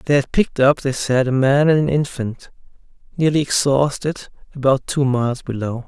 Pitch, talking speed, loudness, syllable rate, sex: 135 Hz, 175 wpm, -18 LUFS, 5.1 syllables/s, male